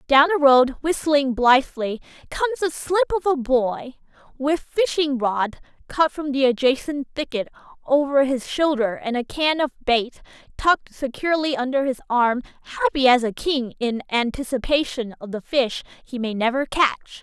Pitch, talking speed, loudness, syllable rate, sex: 270 Hz, 155 wpm, -21 LUFS, 4.7 syllables/s, female